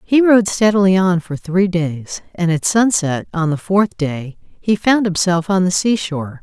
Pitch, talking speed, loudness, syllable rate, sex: 180 Hz, 185 wpm, -16 LUFS, 4.3 syllables/s, female